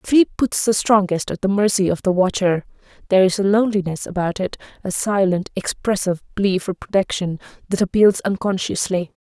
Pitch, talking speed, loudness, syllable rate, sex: 190 Hz, 160 wpm, -19 LUFS, 5.5 syllables/s, female